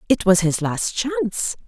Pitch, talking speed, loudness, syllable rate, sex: 220 Hz, 180 wpm, -20 LUFS, 4.3 syllables/s, female